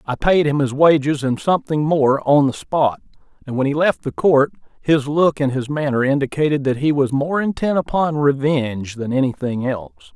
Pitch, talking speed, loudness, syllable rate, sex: 140 Hz, 195 wpm, -18 LUFS, 5.2 syllables/s, male